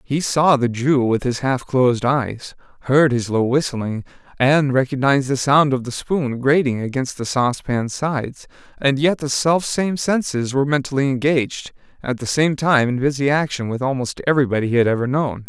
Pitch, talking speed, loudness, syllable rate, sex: 135 Hz, 185 wpm, -19 LUFS, 5.1 syllables/s, male